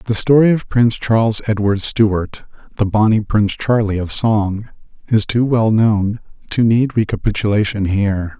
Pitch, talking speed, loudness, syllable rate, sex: 110 Hz, 150 wpm, -16 LUFS, 4.7 syllables/s, male